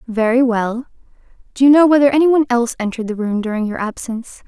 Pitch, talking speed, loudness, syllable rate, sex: 245 Hz, 200 wpm, -16 LUFS, 7.0 syllables/s, female